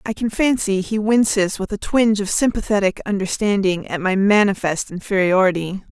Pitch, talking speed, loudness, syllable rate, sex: 200 Hz, 150 wpm, -19 LUFS, 5.2 syllables/s, female